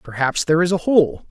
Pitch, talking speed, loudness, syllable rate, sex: 165 Hz, 230 wpm, -18 LUFS, 5.9 syllables/s, male